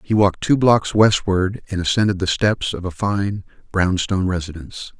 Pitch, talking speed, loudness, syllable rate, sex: 95 Hz, 180 wpm, -19 LUFS, 5.1 syllables/s, male